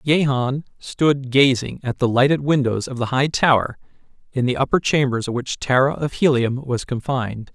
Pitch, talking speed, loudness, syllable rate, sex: 130 Hz, 175 wpm, -20 LUFS, 4.9 syllables/s, male